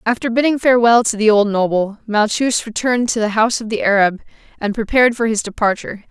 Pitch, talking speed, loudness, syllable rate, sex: 220 Hz, 195 wpm, -16 LUFS, 6.4 syllables/s, female